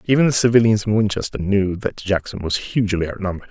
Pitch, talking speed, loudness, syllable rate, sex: 105 Hz, 190 wpm, -19 LUFS, 6.6 syllables/s, male